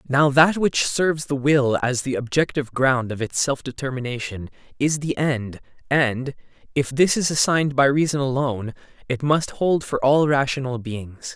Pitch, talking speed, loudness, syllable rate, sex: 135 Hz, 170 wpm, -21 LUFS, 4.7 syllables/s, male